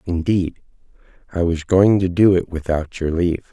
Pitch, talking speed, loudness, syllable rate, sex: 85 Hz, 170 wpm, -18 LUFS, 4.9 syllables/s, male